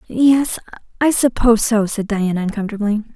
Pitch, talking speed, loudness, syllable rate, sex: 220 Hz, 135 wpm, -17 LUFS, 5.6 syllables/s, female